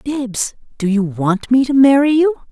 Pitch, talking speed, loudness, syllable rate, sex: 250 Hz, 190 wpm, -15 LUFS, 4.2 syllables/s, female